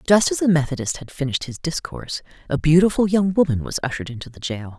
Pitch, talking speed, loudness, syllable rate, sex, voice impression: 155 Hz, 215 wpm, -21 LUFS, 6.7 syllables/s, female, feminine, very adult-like, slightly fluent, slightly intellectual, calm, slightly sweet